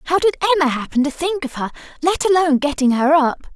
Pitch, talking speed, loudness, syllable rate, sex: 310 Hz, 220 wpm, -18 LUFS, 6.2 syllables/s, female